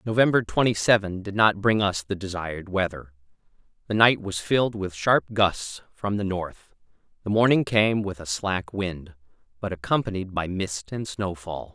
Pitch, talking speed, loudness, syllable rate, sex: 100 Hz, 170 wpm, -24 LUFS, 4.7 syllables/s, male